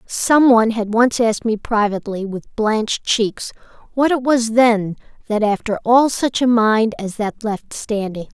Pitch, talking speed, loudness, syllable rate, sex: 225 Hz, 170 wpm, -17 LUFS, 4.4 syllables/s, female